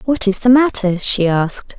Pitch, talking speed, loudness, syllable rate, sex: 215 Hz, 200 wpm, -15 LUFS, 4.8 syllables/s, female